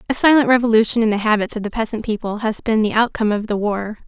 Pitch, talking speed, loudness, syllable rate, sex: 220 Hz, 250 wpm, -18 LUFS, 6.8 syllables/s, female